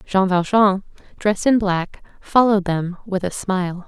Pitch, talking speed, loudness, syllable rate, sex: 195 Hz, 155 wpm, -19 LUFS, 4.7 syllables/s, female